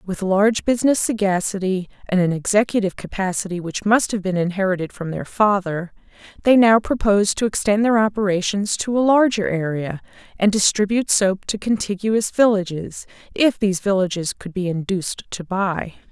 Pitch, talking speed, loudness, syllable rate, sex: 200 Hz, 155 wpm, -19 LUFS, 5.4 syllables/s, female